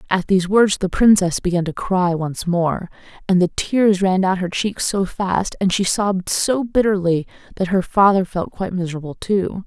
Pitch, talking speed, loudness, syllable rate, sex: 185 Hz, 190 wpm, -18 LUFS, 4.8 syllables/s, female